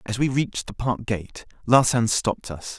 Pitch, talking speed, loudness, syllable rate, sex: 115 Hz, 195 wpm, -23 LUFS, 4.9 syllables/s, male